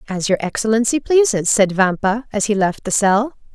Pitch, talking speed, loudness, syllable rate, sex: 215 Hz, 185 wpm, -17 LUFS, 5.3 syllables/s, female